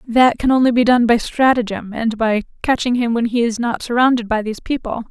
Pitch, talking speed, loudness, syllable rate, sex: 235 Hz, 225 wpm, -17 LUFS, 5.7 syllables/s, female